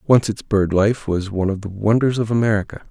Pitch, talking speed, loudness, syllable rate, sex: 105 Hz, 225 wpm, -19 LUFS, 6.0 syllables/s, male